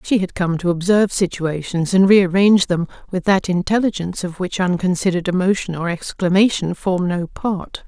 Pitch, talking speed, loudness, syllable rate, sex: 185 Hz, 160 wpm, -18 LUFS, 5.3 syllables/s, female